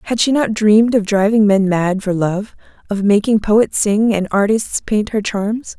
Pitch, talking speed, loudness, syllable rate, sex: 210 Hz, 195 wpm, -15 LUFS, 4.4 syllables/s, female